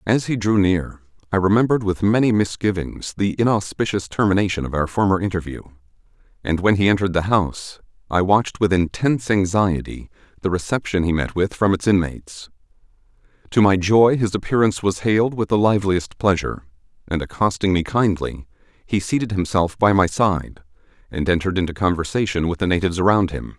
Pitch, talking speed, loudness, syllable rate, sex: 95 Hz, 165 wpm, -20 LUFS, 5.8 syllables/s, male